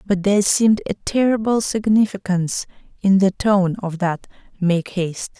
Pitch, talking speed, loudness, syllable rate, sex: 195 Hz, 145 wpm, -19 LUFS, 4.9 syllables/s, female